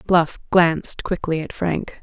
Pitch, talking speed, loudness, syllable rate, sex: 170 Hz, 150 wpm, -21 LUFS, 3.9 syllables/s, female